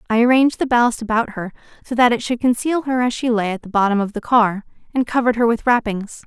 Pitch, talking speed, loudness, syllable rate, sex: 235 Hz, 250 wpm, -18 LUFS, 6.4 syllables/s, female